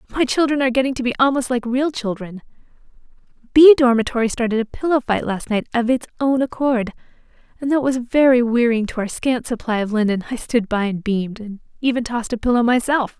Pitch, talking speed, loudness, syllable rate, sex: 240 Hz, 205 wpm, -19 LUFS, 6.2 syllables/s, female